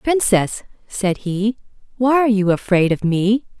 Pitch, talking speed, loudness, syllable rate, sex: 210 Hz, 150 wpm, -18 LUFS, 4.3 syllables/s, female